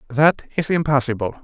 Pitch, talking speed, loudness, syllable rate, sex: 140 Hz, 125 wpm, -19 LUFS, 5.2 syllables/s, male